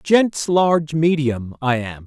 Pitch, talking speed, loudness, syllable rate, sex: 150 Hz, 145 wpm, -19 LUFS, 3.5 syllables/s, male